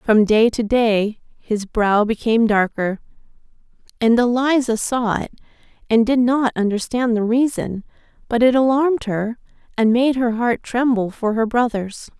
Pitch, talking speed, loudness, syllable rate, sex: 230 Hz, 150 wpm, -18 LUFS, 4.4 syllables/s, female